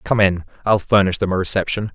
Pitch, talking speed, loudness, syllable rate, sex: 95 Hz, 215 wpm, -18 LUFS, 6.1 syllables/s, male